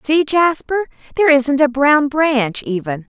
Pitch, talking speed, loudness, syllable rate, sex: 280 Hz, 150 wpm, -15 LUFS, 4.1 syllables/s, female